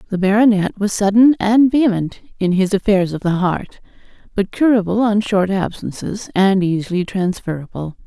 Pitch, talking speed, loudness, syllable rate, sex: 200 Hz, 150 wpm, -17 LUFS, 5.0 syllables/s, female